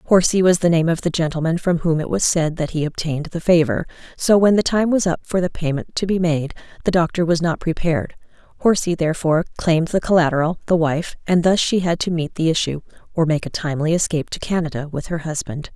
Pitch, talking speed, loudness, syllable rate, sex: 165 Hz, 225 wpm, -19 LUFS, 6.2 syllables/s, female